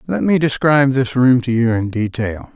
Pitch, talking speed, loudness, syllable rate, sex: 125 Hz, 210 wpm, -16 LUFS, 5.0 syllables/s, male